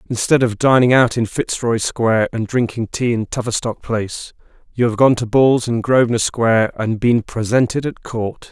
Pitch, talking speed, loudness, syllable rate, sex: 115 Hz, 185 wpm, -17 LUFS, 5.0 syllables/s, male